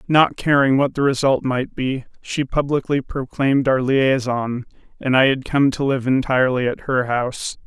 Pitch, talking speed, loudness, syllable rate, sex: 130 Hz, 170 wpm, -19 LUFS, 4.8 syllables/s, male